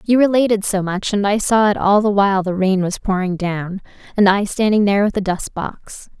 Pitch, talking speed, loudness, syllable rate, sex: 200 Hz, 230 wpm, -17 LUFS, 5.3 syllables/s, female